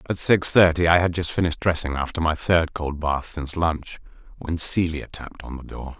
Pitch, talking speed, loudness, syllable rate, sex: 80 Hz, 210 wpm, -22 LUFS, 5.3 syllables/s, male